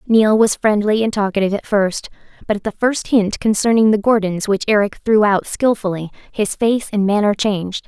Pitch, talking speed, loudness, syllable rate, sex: 210 Hz, 190 wpm, -17 LUFS, 5.2 syllables/s, female